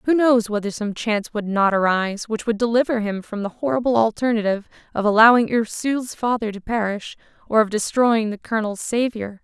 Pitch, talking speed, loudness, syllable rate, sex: 220 Hz, 180 wpm, -20 LUFS, 5.7 syllables/s, female